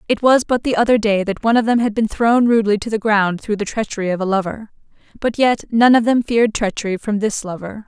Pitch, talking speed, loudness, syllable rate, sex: 220 Hz, 250 wpm, -17 LUFS, 6.1 syllables/s, female